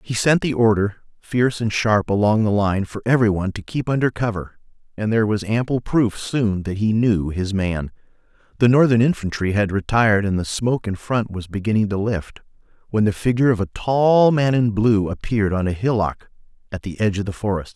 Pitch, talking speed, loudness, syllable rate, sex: 105 Hz, 205 wpm, -20 LUFS, 5.6 syllables/s, male